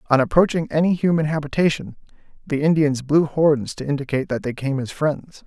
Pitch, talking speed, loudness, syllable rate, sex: 150 Hz, 175 wpm, -20 LUFS, 5.7 syllables/s, male